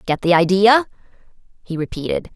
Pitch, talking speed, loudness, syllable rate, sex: 195 Hz, 125 wpm, -17 LUFS, 5.6 syllables/s, female